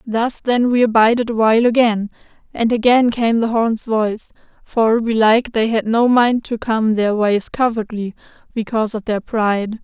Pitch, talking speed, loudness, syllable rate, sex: 225 Hz, 170 wpm, -16 LUFS, 4.8 syllables/s, female